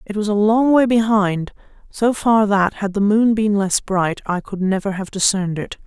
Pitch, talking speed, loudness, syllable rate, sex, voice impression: 205 Hz, 205 wpm, -18 LUFS, 4.7 syllables/s, female, very feminine, middle-aged, slightly thin, tensed, very powerful, slightly dark, soft, clear, fluent, cool, intellectual, slightly refreshing, slightly sincere, calm, slightly friendly, slightly reassuring, very unique, slightly elegant, wild, slightly sweet, lively, strict, slightly intense, sharp